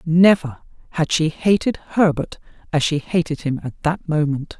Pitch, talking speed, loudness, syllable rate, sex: 160 Hz, 155 wpm, -19 LUFS, 4.5 syllables/s, female